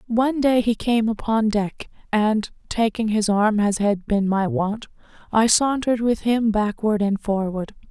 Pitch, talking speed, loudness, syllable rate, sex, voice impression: 215 Hz, 165 wpm, -21 LUFS, 4.3 syllables/s, female, very feminine, young, very thin, slightly tensed, slightly weak, slightly dark, soft, very clear, very fluent, very cute, intellectual, very refreshing, very sincere, calm, very friendly, very reassuring, unique, very elegant, very sweet, lively, very kind, modest